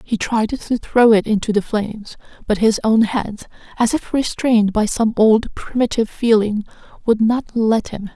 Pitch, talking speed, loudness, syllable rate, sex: 220 Hz, 175 wpm, -17 LUFS, 4.6 syllables/s, female